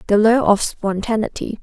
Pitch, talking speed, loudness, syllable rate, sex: 210 Hz, 150 wpm, -18 LUFS, 4.9 syllables/s, female